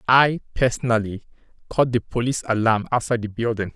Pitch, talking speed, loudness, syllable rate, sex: 115 Hz, 145 wpm, -22 LUFS, 6.3 syllables/s, male